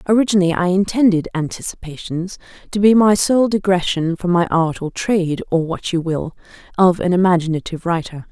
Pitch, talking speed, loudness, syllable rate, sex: 180 Hz, 160 wpm, -17 LUFS, 5.6 syllables/s, female